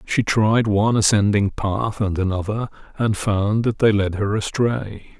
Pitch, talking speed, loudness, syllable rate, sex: 105 Hz, 160 wpm, -20 LUFS, 4.3 syllables/s, male